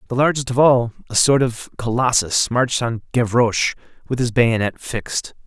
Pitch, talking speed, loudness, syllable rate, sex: 120 Hz, 165 wpm, -18 LUFS, 5.2 syllables/s, male